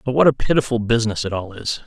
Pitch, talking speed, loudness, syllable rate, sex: 120 Hz, 255 wpm, -20 LUFS, 6.8 syllables/s, male